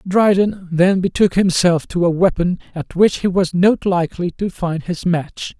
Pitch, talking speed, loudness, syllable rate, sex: 180 Hz, 180 wpm, -17 LUFS, 4.4 syllables/s, male